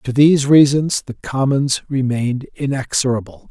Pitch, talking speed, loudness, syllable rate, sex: 135 Hz, 120 wpm, -17 LUFS, 4.8 syllables/s, male